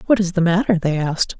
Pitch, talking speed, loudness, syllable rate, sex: 175 Hz, 260 wpm, -18 LUFS, 6.5 syllables/s, female